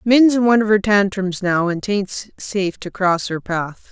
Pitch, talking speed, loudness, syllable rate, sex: 200 Hz, 215 wpm, -18 LUFS, 4.5 syllables/s, female